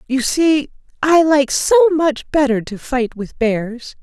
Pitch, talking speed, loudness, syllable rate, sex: 275 Hz, 165 wpm, -16 LUFS, 3.6 syllables/s, female